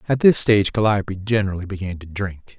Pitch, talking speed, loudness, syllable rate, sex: 100 Hz, 185 wpm, -20 LUFS, 6.4 syllables/s, male